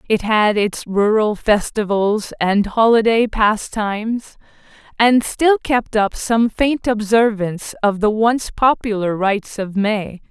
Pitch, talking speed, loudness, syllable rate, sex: 215 Hz, 130 wpm, -17 LUFS, 3.8 syllables/s, female